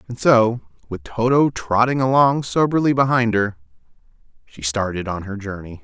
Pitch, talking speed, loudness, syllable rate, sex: 115 Hz, 145 wpm, -19 LUFS, 4.9 syllables/s, male